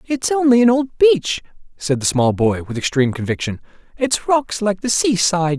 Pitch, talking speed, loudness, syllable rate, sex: 190 Hz, 185 wpm, -17 LUFS, 5.0 syllables/s, male